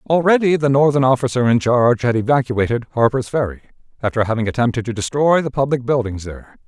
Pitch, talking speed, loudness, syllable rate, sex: 125 Hz, 170 wpm, -17 LUFS, 6.3 syllables/s, male